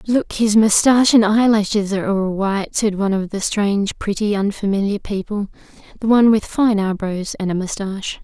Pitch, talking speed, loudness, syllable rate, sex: 205 Hz, 160 wpm, -18 LUFS, 5.3 syllables/s, female